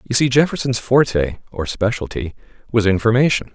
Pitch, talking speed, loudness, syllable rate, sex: 115 Hz, 135 wpm, -18 LUFS, 5.4 syllables/s, male